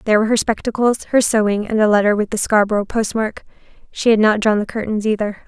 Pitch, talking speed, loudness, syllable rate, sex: 215 Hz, 220 wpm, -17 LUFS, 6.4 syllables/s, female